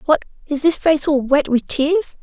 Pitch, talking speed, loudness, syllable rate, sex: 300 Hz, 215 wpm, -17 LUFS, 4.3 syllables/s, female